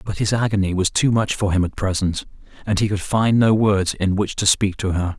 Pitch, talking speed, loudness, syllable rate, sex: 100 Hz, 255 wpm, -19 LUFS, 5.3 syllables/s, male